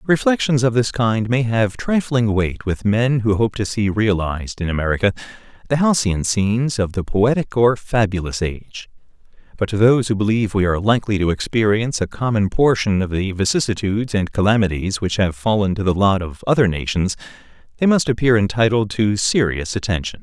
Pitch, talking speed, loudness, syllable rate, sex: 105 Hz, 180 wpm, -18 LUFS, 5.6 syllables/s, male